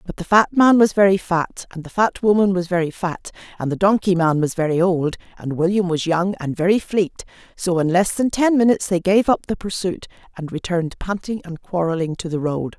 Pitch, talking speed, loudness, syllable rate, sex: 185 Hz, 220 wpm, -19 LUFS, 5.5 syllables/s, female